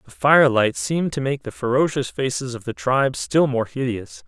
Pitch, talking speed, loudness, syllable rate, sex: 125 Hz, 195 wpm, -21 LUFS, 5.3 syllables/s, male